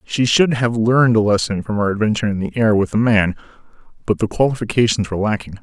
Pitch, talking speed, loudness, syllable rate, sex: 110 Hz, 215 wpm, -17 LUFS, 6.5 syllables/s, male